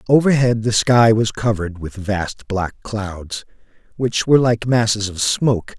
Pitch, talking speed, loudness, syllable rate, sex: 110 Hz, 155 wpm, -18 LUFS, 4.4 syllables/s, male